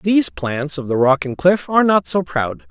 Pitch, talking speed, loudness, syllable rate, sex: 155 Hz, 245 wpm, -17 LUFS, 4.9 syllables/s, male